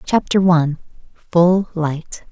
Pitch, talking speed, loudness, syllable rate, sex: 170 Hz, 80 wpm, -17 LUFS, 3.8 syllables/s, female